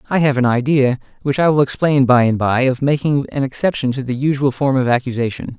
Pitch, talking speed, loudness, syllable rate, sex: 135 Hz, 225 wpm, -16 LUFS, 5.8 syllables/s, male